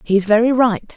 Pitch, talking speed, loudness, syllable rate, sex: 220 Hz, 190 wpm, -15 LUFS, 4.7 syllables/s, female